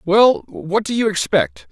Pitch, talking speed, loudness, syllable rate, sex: 205 Hz, 175 wpm, -17 LUFS, 3.9 syllables/s, male